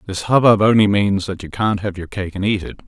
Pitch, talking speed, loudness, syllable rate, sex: 100 Hz, 270 wpm, -17 LUFS, 5.7 syllables/s, male